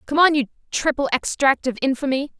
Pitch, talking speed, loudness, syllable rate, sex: 275 Hz, 175 wpm, -20 LUFS, 5.8 syllables/s, female